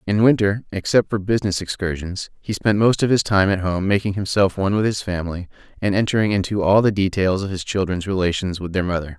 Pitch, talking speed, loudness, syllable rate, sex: 100 Hz, 215 wpm, -20 LUFS, 6.1 syllables/s, male